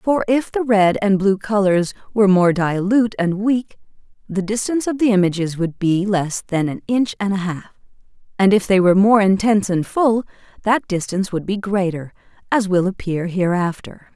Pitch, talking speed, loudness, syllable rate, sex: 200 Hz, 180 wpm, -18 LUFS, 5.1 syllables/s, female